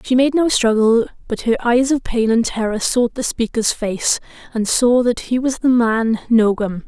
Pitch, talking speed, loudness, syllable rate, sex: 235 Hz, 200 wpm, -17 LUFS, 4.4 syllables/s, female